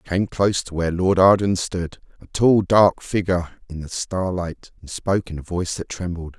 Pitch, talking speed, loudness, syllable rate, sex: 90 Hz, 190 wpm, -21 LUFS, 5.3 syllables/s, male